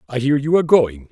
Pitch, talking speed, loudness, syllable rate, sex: 135 Hz, 270 wpm, -16 LUFS, 6.5 syllables/s, male